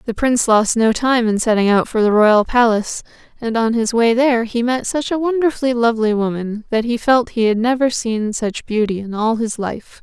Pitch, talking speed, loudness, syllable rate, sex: 230 Hz, 220 wpm, -17 LUFS, 5.3 syllables/s, female